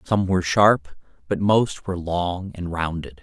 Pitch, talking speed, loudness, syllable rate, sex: 90 Hz, 165 wpm, -22 LUFS, 4.3 syllables/s, male